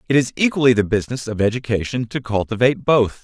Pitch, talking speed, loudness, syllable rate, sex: 120 Hz, 185 wpm, -19 LUFS, 6.7 syllables/s, male